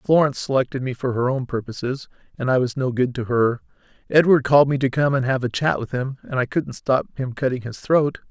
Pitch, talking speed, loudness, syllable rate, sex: 130 Hz, 240 wpm, -21 LUFS, 5.8 syllables/s, male